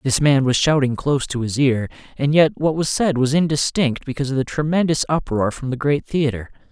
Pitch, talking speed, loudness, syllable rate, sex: 140 Hz, 215 wpm, -19 LUFS, 5.6 syllables/s, male